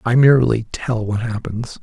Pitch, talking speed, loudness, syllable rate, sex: 115 Hz, 165 wpm, -18 LUFS, 4.6 syllables/s, male